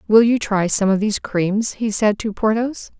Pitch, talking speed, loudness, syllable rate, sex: 210 Hz, 220 wpm, -18 LUFS, 4.7 syllables/s, female